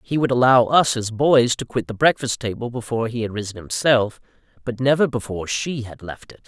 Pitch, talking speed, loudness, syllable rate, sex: 120 Hz, 215 wpm, -20 LUFS, 5.6 syllables/s, male